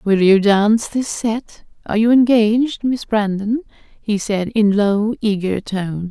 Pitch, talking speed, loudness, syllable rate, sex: 215 Hz, 145 wpm, -17 LUFS, 4.2 syllables/s, female